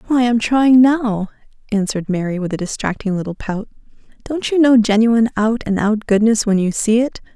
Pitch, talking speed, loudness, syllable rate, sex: 220 Hz, 190 wpm, -16 LUFS, 5.3 syllables/s, female